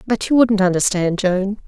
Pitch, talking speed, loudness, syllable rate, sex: 200 Hz, 180 wpm, -17 LUFS, 4.7 syllables/s, female